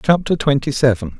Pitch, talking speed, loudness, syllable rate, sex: 135 Hz, 150 wpm, -17 LUFS, 5.7 syllables/s, male